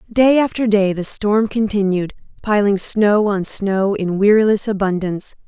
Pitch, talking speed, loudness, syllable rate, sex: 205 Hz, 140 wpm, -17 LUFS, 4.5 syllables/s, female